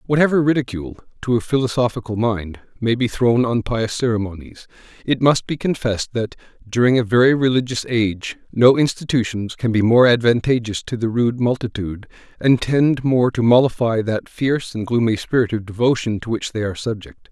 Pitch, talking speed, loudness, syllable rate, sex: 120 Hz, 170 wpm, -19 LUFS, 5.5 syllables/s, male